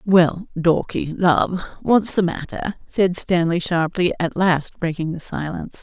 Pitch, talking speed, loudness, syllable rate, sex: 175 Hz, 145 wpm, -20 LUFS, 3.9 syllables/s, female